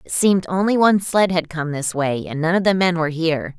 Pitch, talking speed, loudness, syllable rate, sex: 170 Hz, 270 wpm, -19 LUFS, 6.1 syllables/s, female